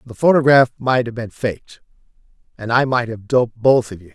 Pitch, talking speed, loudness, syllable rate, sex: 120 Hz, 205 wpm, -17 LUFS, 5.7 syllables/s, male